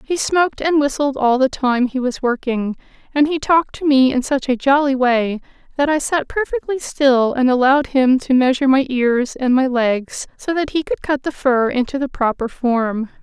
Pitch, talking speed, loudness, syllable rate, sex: 265 Hz, 210 wpm, -17 LUFS, 4.9 syllables/s, female